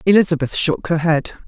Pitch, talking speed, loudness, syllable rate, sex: 165 Hz, 165 wpm, -17 LUFS, 5.7 syllables/s, female